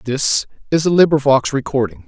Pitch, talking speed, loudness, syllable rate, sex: 135 Hz, 145 wpm, -16 LUFS, 5.1 syllables/s, male